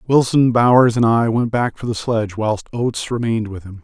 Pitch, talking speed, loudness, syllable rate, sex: 115 Hz, 220 wpm, -17 LUFS, 5.5 syllables/s, male